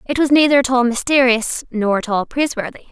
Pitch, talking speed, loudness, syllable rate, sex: 250 Hz, 205 wpm, -16 LUFS, 6.1 syllables/s, female